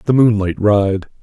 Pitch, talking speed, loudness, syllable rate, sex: 105 Hz, 145 wpm, -15 LUFS, 4.4 syllables/s, male